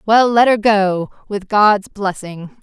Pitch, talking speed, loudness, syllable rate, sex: 205 Hz, 160 wpm, -15 LUFS, 3.5 syllables/s, female